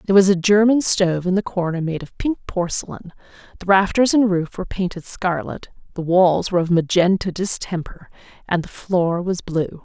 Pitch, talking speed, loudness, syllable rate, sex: 180 Hz, 185 wpm, -19 LUFS, 5.2 syllables/s, female